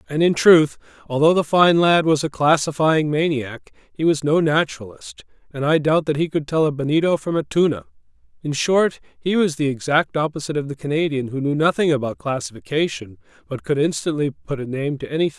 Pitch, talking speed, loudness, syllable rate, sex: 150 Hz, 200 wpm, -19 LUFS, 5.7 syllables/s, male